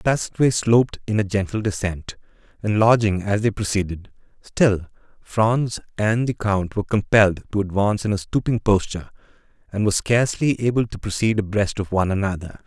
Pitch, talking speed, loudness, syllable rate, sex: 105 Hz, 160 wpm, -21 LUFS, 5.8 syllables/s, male